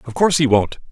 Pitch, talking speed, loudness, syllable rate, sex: 140 Hz, 265 wpm, -16 LUFS, 7.1 syllables/s, male